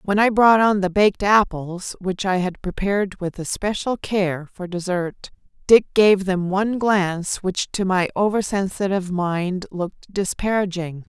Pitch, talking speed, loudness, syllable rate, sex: 190 Hz, 150 wpm, -20 LUFS, 4.4 syllables/s, female